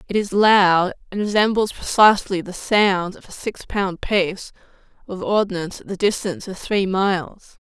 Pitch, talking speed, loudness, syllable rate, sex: 195 Hz, 165 wpm, -19 LUFS, 4.8 syllables/s, female